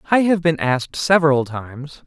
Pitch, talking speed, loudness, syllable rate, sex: 150 Hz, 175 wpm, -18 LUFS, 5.4 syllables/s, male